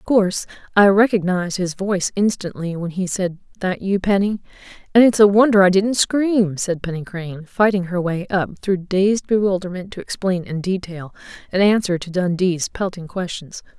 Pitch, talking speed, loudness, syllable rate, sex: 190 Hz, 175 wpm, -19 LUFS, 4.9 syllables/s, female